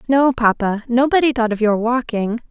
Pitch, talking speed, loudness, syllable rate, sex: 240 Hz, 165 wpm, -17 LUFS, 5.1 syllables/s, female